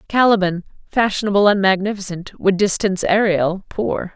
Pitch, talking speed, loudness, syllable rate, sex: 195 Hz, 115 wpm, -18 LUFS, 5.1 syllables/s, female